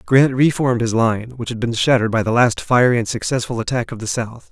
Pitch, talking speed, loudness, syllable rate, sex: 120 Hz, 240 wpm, -18 LUFS, 6.1 syllables/s, male